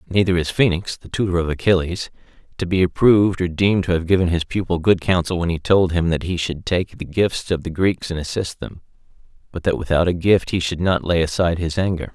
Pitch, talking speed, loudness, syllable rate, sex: 90 Hz, 230 wpm, -19 LUFS, 5.8 syllables/s, male